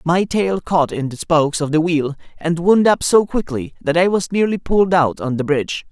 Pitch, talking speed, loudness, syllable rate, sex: 165 Hz, 235 wpm, -17 LUFS, 5.1 syllables/s, male